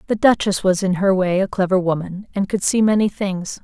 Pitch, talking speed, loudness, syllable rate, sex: 190 Hz, 230 wpm, -18 LUFS, 5.3 syllables/s, female